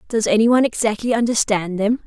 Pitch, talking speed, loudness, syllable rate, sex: 220 Hz, 175 wpm, -18 LUFS, 6.4 syllables/s, female